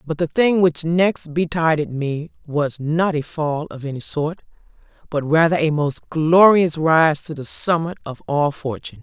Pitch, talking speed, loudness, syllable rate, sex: 155 Hz, 175 wpm, -19 LUFS, 4.2 syllables/s, female